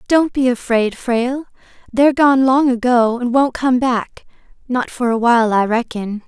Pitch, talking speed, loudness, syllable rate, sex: 245 Hz, 165 wpm, -16 LUFS, 4.6 syllables/s, female